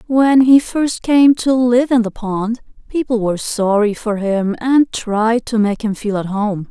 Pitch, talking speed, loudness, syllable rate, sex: 230 Hz, 195 wpm, -15 LUFS, 4.0 syllables/s, female